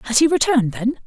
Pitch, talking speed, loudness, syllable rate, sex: 255 Hz, 225 wpm, -18 LUFS, 7.3 syllables/s, female